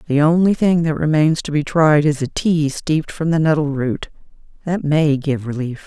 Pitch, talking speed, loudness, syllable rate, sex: 155 Hz, 205 wpm, -17 LUFS, 4.9 syllables/s, female